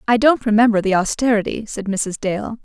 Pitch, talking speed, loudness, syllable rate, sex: 215 Hz, 180 wpm, -18 LUFS, 5.4 syllables/s, female